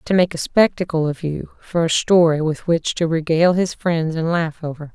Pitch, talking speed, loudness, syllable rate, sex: 165 Hz, 205 wpm, -19 LUFS, 5.0 syllables/s, female